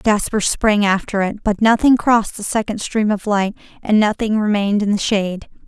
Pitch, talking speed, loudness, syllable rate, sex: 210 Hz, 190 wpm, -17 LUFS, 5.2 syllables/s, female